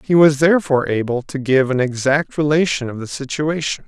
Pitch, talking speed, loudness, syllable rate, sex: 140 Hz, 185 wpm, -17 LUFS, 5.6 syllables/s, male